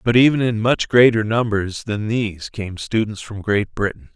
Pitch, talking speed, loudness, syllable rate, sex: 110 Hz, 190 wpm, -19 LUFS, 4.7 syllables/s, male